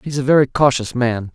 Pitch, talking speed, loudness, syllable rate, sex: 130 Hz, 225 wpm, -16 LUFS, 5.6 syllables/s, male